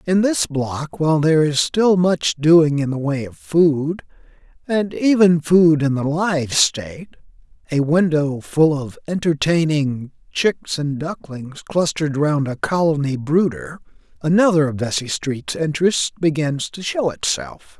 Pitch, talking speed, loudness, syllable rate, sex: 155 Hz, 140 wpm, -18 LUFS, 4.1 syllables/s, male